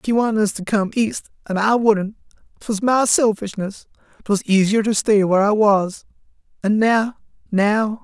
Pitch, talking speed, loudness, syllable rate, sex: 200 Hz, 150 wpm, -18 LUFS, 4.7 syllables/s, male